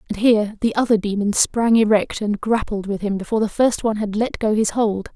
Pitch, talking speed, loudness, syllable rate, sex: 215 Hz, 235 wpm, -19 LUFS, 5.8 syllables/s, female